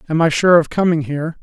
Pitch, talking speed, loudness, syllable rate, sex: 160 Hz, 250 wpm, -15 LUFS, 6.5 syllables/s, male